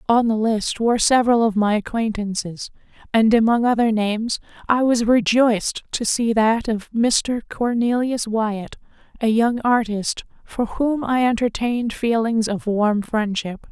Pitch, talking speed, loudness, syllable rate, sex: 225 Hz, 145 wpm, -20 LUFS, 4.3 syllables/s, female